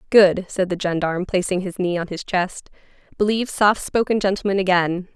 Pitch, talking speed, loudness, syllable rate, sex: 190 Hz, 175 wpm, -20 LUFS, 5.5 syllables/s, female